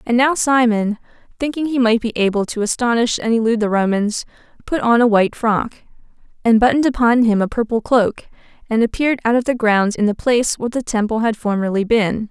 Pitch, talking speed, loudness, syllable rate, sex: 230 Hz, 200 wpm, -17 LUFS, 5.9 syllables/s, female